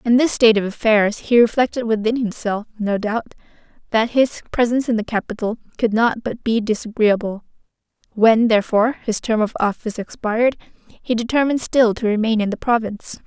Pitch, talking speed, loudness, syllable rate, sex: 225 Hz, 165 wpm, -19 LUFS, 5.8 syllables/s, female